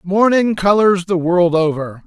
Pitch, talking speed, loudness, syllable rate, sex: 185 Hz, 145 wpm, -14 LUFS, 4.1 syllables/s, male